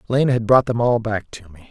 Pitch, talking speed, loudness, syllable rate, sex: 115 Hz, 280 wpm, -18 LUFS, 5.9 syllables/s, male